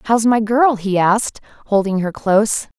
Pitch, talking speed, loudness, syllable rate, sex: 215 Hz, 170 wpm, -16 LUFS, 4.9 syllables/s, female